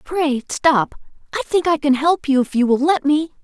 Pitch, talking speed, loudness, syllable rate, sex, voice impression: 295 Hz, 225 wpm, -18 LUFS, 4.8 syllables/s, female, feminine, adult-like, slightly intellectual, slightly unique, slightly strict